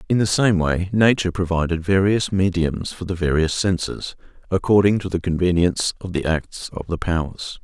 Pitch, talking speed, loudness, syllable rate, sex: 90 Hz, 175 wpm, -20 LUFS, 5.2 syllables/s, male